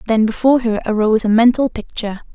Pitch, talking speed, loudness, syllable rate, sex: 225 Hz, 180 wpm, -15 LUFS, 7.1 syllables/s, female